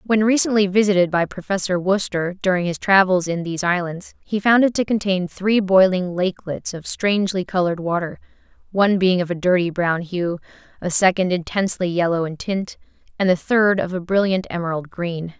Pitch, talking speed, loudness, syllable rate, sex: 185 Hz, 175 wpm, -20 LUFS, 5.5 syllables/s, female